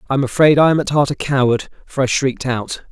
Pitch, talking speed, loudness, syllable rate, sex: 135 Hz, 270 wpm, -16 LUFS, 6.4 syllables/s, male